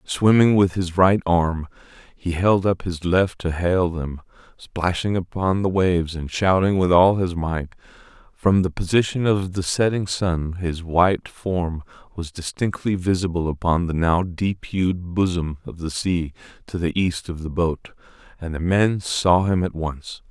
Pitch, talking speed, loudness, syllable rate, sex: 90 Hz, 170 wpm, -21 LUFS, 4.2 syllables/s, male